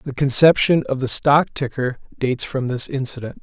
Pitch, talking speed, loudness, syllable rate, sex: 135 Hz, 175 wpm, -19 LUFS, 5.2 syllables/s, male